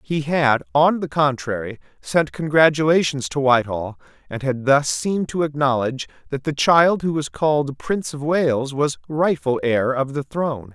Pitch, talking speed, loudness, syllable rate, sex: 140 Hz, 170 wpm, -20 LUFS, 4.8 syllables/s, male